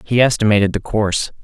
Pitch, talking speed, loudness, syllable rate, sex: 105 Hz, 170 wpm, -16 LUFS, 6.4 syllables/s, male